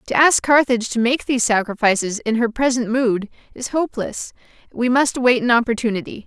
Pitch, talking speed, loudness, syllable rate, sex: 240 Hz, 170 wpm, -18 LUFS, 5.9 syllables/s, female